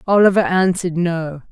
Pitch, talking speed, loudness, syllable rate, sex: 175 Hz, 120 wpm, -17 LUFS, 5.3 syllables/s, female